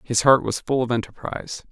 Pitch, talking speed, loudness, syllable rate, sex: 120 Hz, 210 wpm, -22 LUFS, 5.7 syllables/s, male